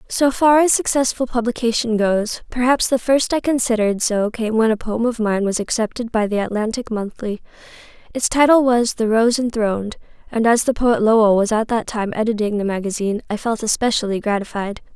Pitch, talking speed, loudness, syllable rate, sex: 225 Hz, 185 wpm, -18 LUFS, 5.5 syllables/s, female